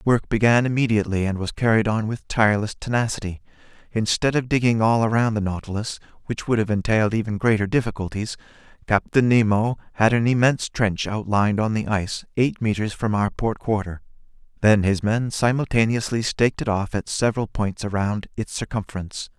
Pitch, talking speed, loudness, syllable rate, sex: 110 Hz, 165 wpm, -22 LUFS, 5.7 syllables/s, male